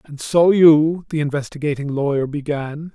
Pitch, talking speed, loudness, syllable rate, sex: 150 Hz, 140 wpm, -18 LUFS, 4.7 syllables/s, male